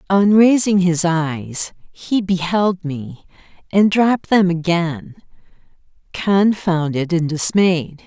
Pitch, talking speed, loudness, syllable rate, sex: 180 Hz, 105 wpm, -17 LUFS, 3.3 syllables/s, female